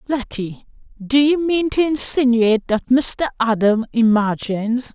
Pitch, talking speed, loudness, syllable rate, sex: 245 Hz, 120 wpm, -18 LUFS, 4.3 syllables/s, female